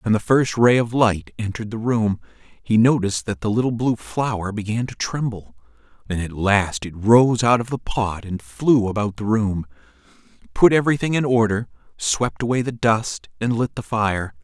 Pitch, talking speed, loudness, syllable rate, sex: 110 Hz, 185 wpm, -20 LUFS, 4.8 syllables/s, male